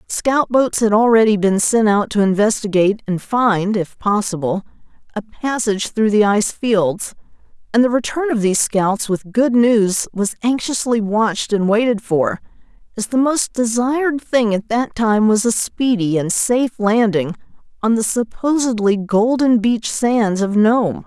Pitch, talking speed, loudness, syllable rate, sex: 220 Hz, 160 wpm, -17 LUFS, 4.4 syllables/s, female